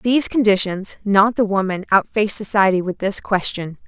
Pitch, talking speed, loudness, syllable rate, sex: 200 Hz, 125 wpm, -18 LUFS, 5.3 syllables/s, female